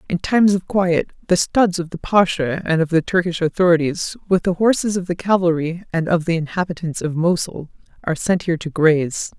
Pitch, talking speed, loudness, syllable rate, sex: 175 Hz, 200 wpm, -19 LUFS, 5.6 syllables/s, female